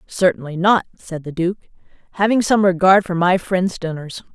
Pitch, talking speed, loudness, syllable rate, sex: 180 Hz, 165 wpm, -17 LUFS, 5.0 syllables/s, female